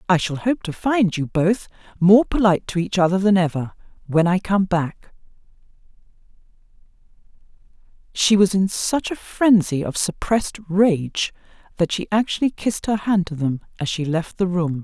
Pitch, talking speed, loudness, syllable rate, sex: 185 Hz, 160 wpm, -20 LUFS, 4.8 syllables/s, female